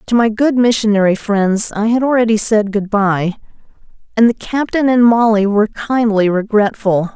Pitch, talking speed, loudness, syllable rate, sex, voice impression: 220 Hz, 160 wpm, -14 LUFS, 4.8 syllables/s, female, very feminine, very adult-like, middle-aged, thin, tensed, powerful, very bright, soft, clear, very fluent, slightly cool, intellectual, very refreshing, sincere, calm, friendly, reassuring, very unique, very elegant, sweet, very lively, kind, slightly intense, sharp